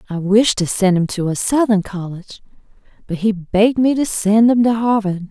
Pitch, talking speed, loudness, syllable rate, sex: 210 Hz, 205 wpm, -16 LUFS, 5.2 syllables/s, female